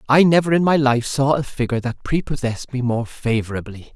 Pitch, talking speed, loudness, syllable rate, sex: 130 Hz, 195 wpm, -19 LUFS, 5.8 syllables/s, male